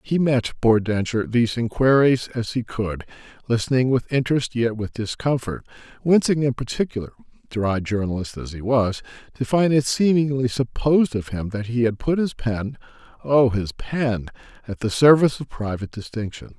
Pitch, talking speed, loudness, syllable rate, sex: 120 Hz, 155 wpm, -21 LUFS, 5.1 syllables/s, male